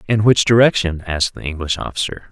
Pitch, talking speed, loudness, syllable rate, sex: 100 Hz, 180 wpm, -17 LUFS, 6.3 syllables/s, male